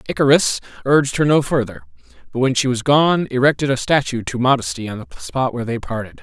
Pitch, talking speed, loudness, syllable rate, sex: 130 Hz, 205 wpm, -18 LUFS, 6.1 syllables/s, male